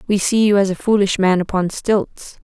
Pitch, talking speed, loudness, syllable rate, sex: 195 Hz, 220 wpm, -17 LUFS, 4.9 syllables/s, female